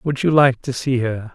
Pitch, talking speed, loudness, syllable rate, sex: 130 Hz, 270 wpm, -18 LUFS, 4.6 syllables/s, male